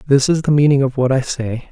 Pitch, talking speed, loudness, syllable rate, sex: 135 Hz, 280 wpm, -16 LUFS, 5.7 syllables/s, male